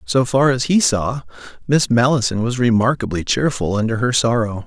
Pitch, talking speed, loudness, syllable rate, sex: 120 Hz, 165 wpm, -17 LUFS, 5.1 syllables/s, male